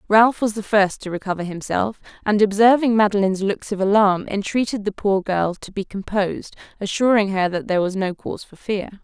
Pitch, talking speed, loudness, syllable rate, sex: 200 Hz, 195 wpm, -20 LUFS, 5.6 syllables/s, female